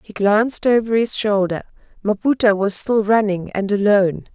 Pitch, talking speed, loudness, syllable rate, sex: 210 Hz, 150 wpm, -18 LUFS, 5.0 syllables/s, female